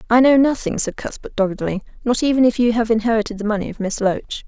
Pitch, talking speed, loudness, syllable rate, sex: 225 Hz, 230 wpm, -19 LUFS, 6.4 syllables/s, female